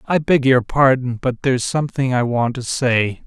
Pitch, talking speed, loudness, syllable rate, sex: 130 Hz, 200 wpm, -18 LUFS, 4.9 syllables/s, male